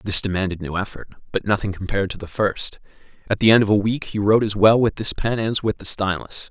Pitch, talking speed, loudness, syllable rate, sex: 105 Hz, 250 wpm, -20 LUFS, 6.1 syllables/s, male